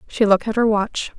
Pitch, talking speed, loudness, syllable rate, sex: 215 Hz, 255 wpm, -18 LUFS, 5.9 syllables/s, female